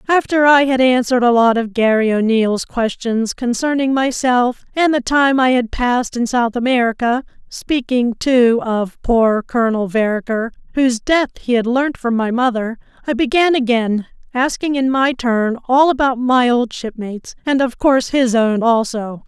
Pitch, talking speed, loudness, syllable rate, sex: 245 Hz, 165 wpm, -16 LUFS, 4.6 syllables/s, female